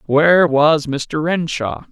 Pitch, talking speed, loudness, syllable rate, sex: 155 Hz, 125 wpm, -16 LUFS, 3.4 syllables/s, male